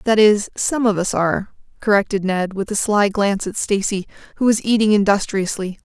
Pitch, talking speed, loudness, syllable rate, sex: 205 Hz, 185 wpm, -18 LUFS, 5.4 syllables/s, female